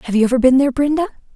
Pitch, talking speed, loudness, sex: 260 Hz, 265 wpm, -15 LUFS, female